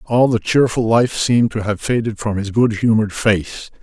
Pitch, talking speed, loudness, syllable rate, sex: 110 Hz, 205 wpm, -17 LUFS, 5.0 syllables/s, male